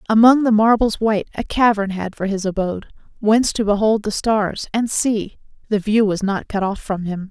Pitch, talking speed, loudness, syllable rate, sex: 210 Hz, 205 wpm, -18 LUFS, 5.2 syllables/s, female